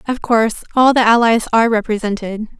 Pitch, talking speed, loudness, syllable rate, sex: 225 Hz, 160 wpm, -14 LUFS, 6.2 syllables/s, female